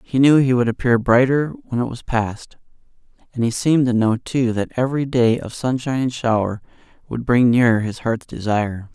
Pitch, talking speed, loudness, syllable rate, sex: 120 Hz, 195 wpm, -19 LUFS, 5.4 syllables/s, male